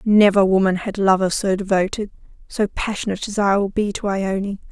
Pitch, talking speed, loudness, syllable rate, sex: 195 Hz, 165 wpm, -19 LUFS, 5.3 syllables/s, female